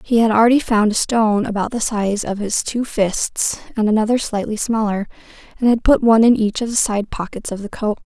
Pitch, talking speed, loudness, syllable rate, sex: 220 Hz, 225 wpm, -17 LUFS, 5.6 syllables/s, female